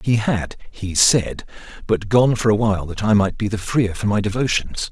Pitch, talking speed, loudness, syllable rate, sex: 105 Hz, 220 wpm, -19 LUFS, 4.9 syllables/s, male